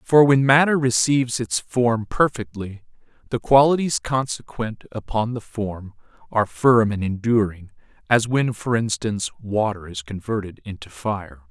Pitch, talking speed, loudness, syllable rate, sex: 110 Hz, 135 wpm, -21 LUFS, 4.5 syllables/s, male